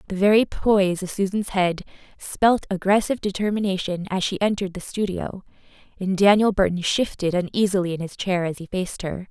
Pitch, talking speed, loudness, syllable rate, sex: 190 Hz, 170 wpm, -22 LUFS, 5.7 syllables/s, female